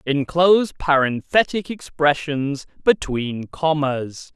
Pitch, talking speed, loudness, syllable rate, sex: 150 Hz, 70 wpm, -20 LUFS, 3.5 syllables/s, male